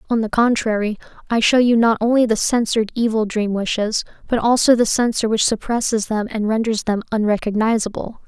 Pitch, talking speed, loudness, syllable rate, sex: 220 Hz, 175 wpm, -18 LUFS, 5.6 syllables/s, female